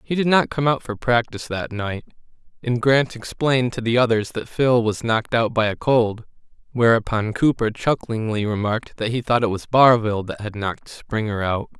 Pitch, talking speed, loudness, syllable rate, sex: 115 Hz, 195 wpm, -20 LUFS, 5.3 syllables/s, male